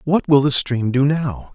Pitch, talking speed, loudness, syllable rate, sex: 140 Hz, 235 wpm, -17 LUFS, 4.3 syllables/s, male